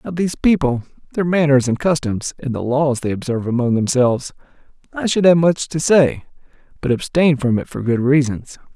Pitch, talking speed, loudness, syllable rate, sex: 140 Hz, 185 wpm, -17 LUFS, 5.4 syllables/s, male